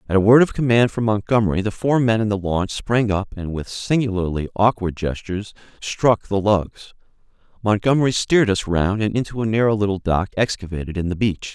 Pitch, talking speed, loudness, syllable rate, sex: 105 Hz, 190 wpm, -20 LUFS, 5.6 syllables/s, male